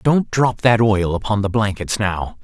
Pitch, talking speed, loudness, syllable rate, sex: 105 Hz, 195 wpm, -18 LUFS, 4.3 syllables/s, male